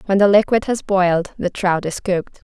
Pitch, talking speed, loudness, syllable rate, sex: 190 Hz, 215 wpm, -18 LUFS, 5.3 syllables/s, female